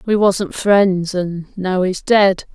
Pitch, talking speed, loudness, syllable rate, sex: 190 Hz, 165 wpm, -16 LUFS, 2.9 syllables/s, female